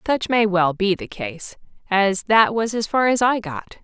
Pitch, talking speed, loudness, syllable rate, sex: 205 Hz, 220 wpm, -19 LUFS, 4.4 syllables/s, female